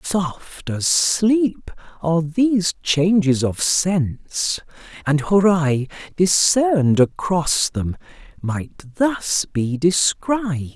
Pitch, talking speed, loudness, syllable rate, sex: 170 Hz, 95 wpm, -19 LUFS, 3.0 syllables/s, male